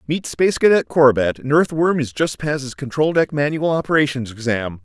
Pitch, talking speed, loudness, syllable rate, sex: 140 Hz, 175 wpm, -18 LUFS, 5.6 syllables/s, male